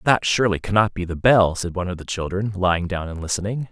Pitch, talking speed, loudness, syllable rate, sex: 95 Hz, 240 wpm, -21 LUFS, 6.5 syllables/s, male